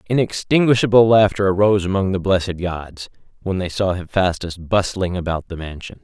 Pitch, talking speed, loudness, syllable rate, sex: 95 Hz, 150 wpm, -18 LUFS, 5.4 syllables/s, male